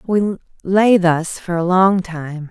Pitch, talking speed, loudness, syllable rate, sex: 180 Hz, 170 wpm, -16 LUFS, 3.3 syllables/s, female